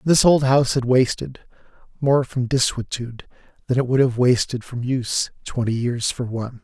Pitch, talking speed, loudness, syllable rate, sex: 125 Hz, 165 wpm, -20 LUFS, 5.1 syllables/s, male